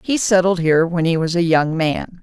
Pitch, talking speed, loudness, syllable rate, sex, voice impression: 175 Hz, 245 wpm, -17 LUFS, 5.2 syllables/s, female, feminine, middle-aged, tensed, powerful, slightly hard, slightly muffled, intellectual, calm, elegant, lively, slightly strict, slightly sharp